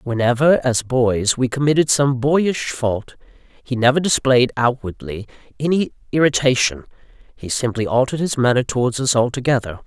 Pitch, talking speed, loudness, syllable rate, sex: 125 Hz, 130 wpm, -18 LUFS, 5.0 syllables/s, male